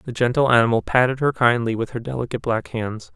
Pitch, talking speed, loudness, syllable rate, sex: 120 Hz, 210 wpm, -20 LUFS, 6.3 syllables/s, male